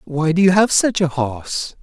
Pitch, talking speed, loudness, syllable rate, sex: 170 Hz, 230 wpm, -17 LUFS, 4.8 syllables/s, male